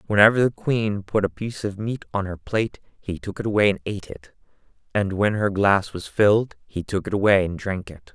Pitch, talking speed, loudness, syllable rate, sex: 100 Hz, 230 wpm, -22 LUFS, 5.5 syllables/s, male